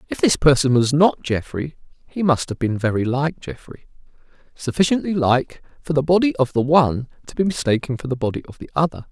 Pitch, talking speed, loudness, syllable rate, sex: 145 Hz, 195 wpm, -19 LUFS, 5.7 syllables/s, male